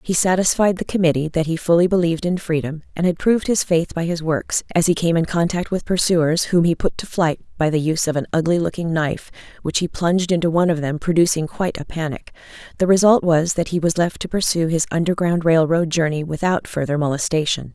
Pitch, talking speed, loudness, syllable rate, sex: 170 Hz, 225 wpm, -19 LUFS, 6.0 syllables/s, female